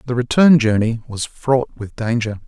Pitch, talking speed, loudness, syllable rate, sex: 120 Hz, 170 wpm, -17 LUFS, 4.6 syllables/s, male